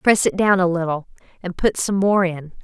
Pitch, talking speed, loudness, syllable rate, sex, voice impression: 180 Hz, 225 wpm, -19 LUFS, 5.0 syllables/s, female, feminine, slightly gender-neutral, very adult-like, slightly middle-aged, slightly thin, tensed, slightly powerful, bright, hard, very clear, fluent, cool, intellectual, sincere, calm, slightly friendly, slightly reassuring, elegant, slightly lively, slightly strict